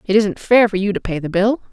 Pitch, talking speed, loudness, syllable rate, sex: 205 Hz, 315 wpm, -17 LUFS, 5.8 syllables/s, female